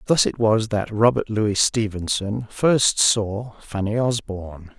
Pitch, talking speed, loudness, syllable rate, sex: 110 Hz, 140 wpm, -21 LUFS, 3.8 syllables/s, male